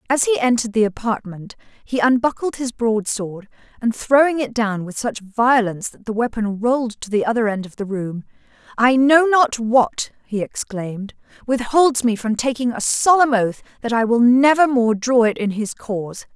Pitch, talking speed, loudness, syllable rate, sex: 230 Hz, 185 wpm, -18 LUFS, 4.9 syllables/s, female